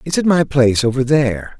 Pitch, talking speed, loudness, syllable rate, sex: 140 Hz, 225 wpm, -15 LUFS, 6.2 syllables/s, male